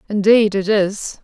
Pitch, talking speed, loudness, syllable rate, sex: 205 Hz, 145 wpm, -16 LUFS, 3.9 syllables/s, female